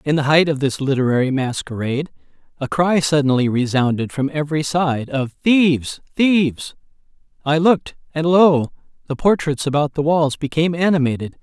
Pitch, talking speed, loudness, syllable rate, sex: 150 Hz, 145 wpm, -18 LUFS, 5.4 syllables/s, male